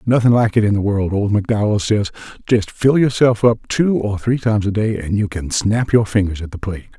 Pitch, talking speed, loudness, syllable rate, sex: 105 Hz, 240 wpm, -17 LUFS, 5.6 syllables/s, male